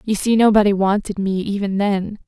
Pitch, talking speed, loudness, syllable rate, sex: 200 Hz, 185 wpm, -18 LUFS, 5.2 syllables/s, female